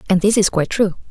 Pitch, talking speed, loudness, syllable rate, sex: 195 Hz, 270 wpm, -17 LUFS, 7.1 syllables/s, female